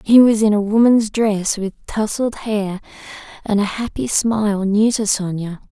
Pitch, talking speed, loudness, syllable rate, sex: 210 Hz, 170 wpm, -17 LUFS, 4.3 syllables/s, female